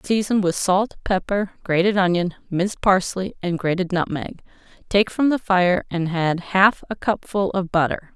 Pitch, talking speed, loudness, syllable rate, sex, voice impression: 185 Hz, 160 wpm, -21 LUFS, 4.5 syllables/s, female, very feminine, very middle-aged, slightly thin, tensed, slightly powerful, bright, hard, very clear, very fluent, cool, very intellectual, refreshing, very sincere, very calm, very friendly, very reassuring, slightly unique, elegant, slightly wild, sweet, slightly lively, slightly kind, slightly modest